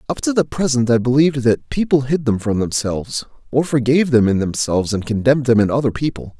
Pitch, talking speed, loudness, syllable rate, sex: 130 Hz, 215 wpm, -17 LUFS, 6.2 syllables/s, male